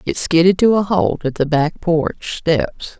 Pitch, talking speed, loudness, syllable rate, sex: 165 Hz, 200 wpm, -17 LUFS, 3.8 syllables/s, female